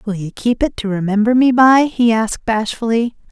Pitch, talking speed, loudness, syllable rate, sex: 225 Hz, 200 wpm, -15 LUFS, 5.3 syllables/s, female